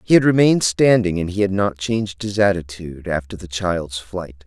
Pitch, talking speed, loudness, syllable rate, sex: 95 Hz, 190 wpm, -19 LUFS, 5.0 syllables/s, male